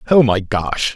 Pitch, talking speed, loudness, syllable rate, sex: 115 Hz, 190 wpm, -16 LUFS, 3.8 syllables/s, male